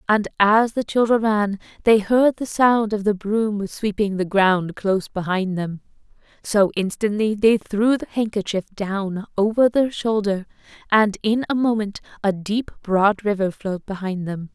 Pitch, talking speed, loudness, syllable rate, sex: 205 Hz, 160 wpm, -20 LUFS, 4.3 syllables/s, female